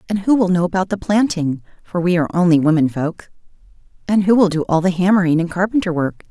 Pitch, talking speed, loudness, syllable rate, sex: 180 Hz, 210 wpm, -17 LUFS, 6.4 syllables/s, female